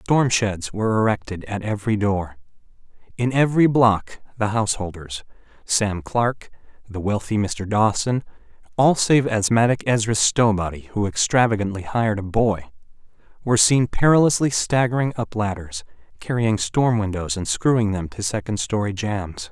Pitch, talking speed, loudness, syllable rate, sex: 110 Hz, 135 wpm, -21 LUFS, 4.9 syllables/s, male